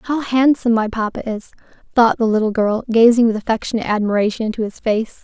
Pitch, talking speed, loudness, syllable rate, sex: 225 Hz, 185 wpm, -17 LUFS, 6.2 syllables/s, female